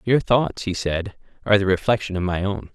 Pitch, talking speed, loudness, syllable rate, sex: 100 Hz, 220 wpm, -21 LUFS, 5.5 syllables/s, male